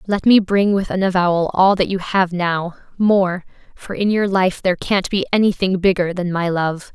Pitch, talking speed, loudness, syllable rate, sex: 185 Hz, 200 wpm, -17 LUFS, 4.9 syllables/s, female